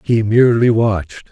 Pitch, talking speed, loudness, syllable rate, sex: 115 Hz, 135 wpm, -14 LUFS, 5.7 syllables/s, male